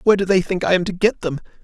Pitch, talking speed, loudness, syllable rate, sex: 185 Hz, 330 wpm, -19 LUFS, 7.5 syllables/s, male